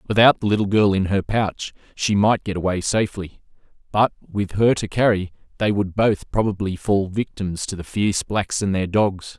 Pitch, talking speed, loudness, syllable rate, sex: 100 Hz, 190 wpm, -21 LUFS, 4.9 syllables/s, male